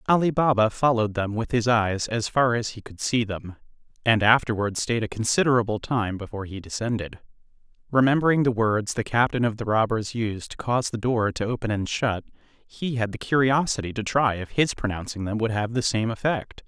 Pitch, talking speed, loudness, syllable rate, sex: 115 Hz, 200 wpm, -24 LUFS, 5.4 syllables/s, male